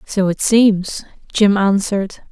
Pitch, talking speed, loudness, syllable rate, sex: 200 Hz, 130 wpm, -15 LUFS, 3.7 syllables/s, female